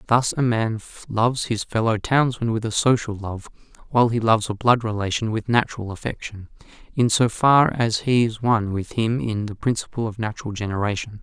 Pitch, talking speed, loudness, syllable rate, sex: 115 Hz, 185 wpm, -22 LUFS, 5.6 syllables/s, male